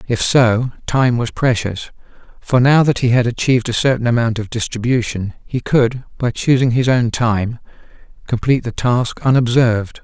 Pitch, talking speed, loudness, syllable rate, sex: 120 Hz, 160 wpm, -16 LUFS, 4.9 syllables/s, male